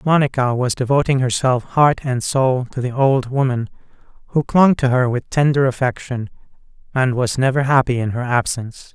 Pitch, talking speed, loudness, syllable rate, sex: 130 Hz, 170 wpm, -18 LUFS, 5.1 syllables/s, male